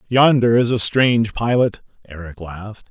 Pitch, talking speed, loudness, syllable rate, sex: 110 Hz, 145 wpm, -16 LUFS, 4.9 syllables/s, male